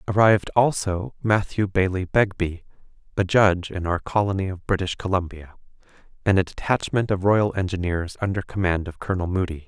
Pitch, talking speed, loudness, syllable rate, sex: 95 Hz, 150 wpm, -23 LUFS, 5.5 syllables/s, male